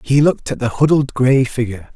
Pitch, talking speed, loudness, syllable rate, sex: 130 Hz, 215 wpm, -16 LUFS, 6.0 syllables/s, male